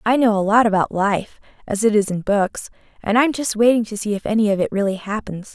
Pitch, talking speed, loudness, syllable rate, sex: 210 Hz, 225 wpm, -19 LUFS, 5.8 syllables/s, female